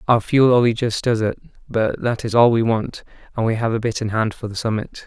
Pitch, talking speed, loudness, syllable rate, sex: 115 Hz, 260 wpm, -19 LUFS, 5.6 syllables/s, male